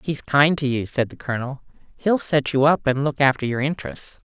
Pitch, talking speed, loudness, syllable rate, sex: 140 Hz, 225 wpm, -21 LUFS, 5.5 syllables/s, female